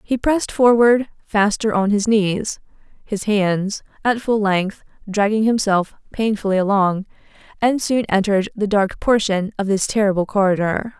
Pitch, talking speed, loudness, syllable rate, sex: 210 Hz, 140 wpm, -18 LUFS, 4.5 syllables/s, female